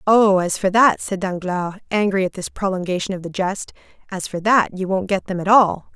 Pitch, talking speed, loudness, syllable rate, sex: 190 Hz, 210 wpm, -19 LUFS, 5.1 syllables/s, female